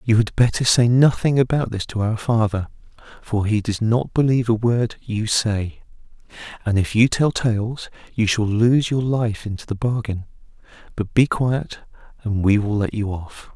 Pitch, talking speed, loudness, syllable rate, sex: 110 Hz, 180 wpm, -20 LUFS, 4.5 syllables/s, male